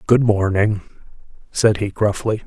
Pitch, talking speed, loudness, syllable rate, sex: 105 Hz, 120 wpm, -19 LUFS, 3.9 syllables/s, male